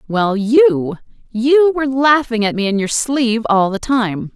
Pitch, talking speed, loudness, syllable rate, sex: 235 Hz, 165 wpm, -15 LUFS, 4.2 syllables/s, female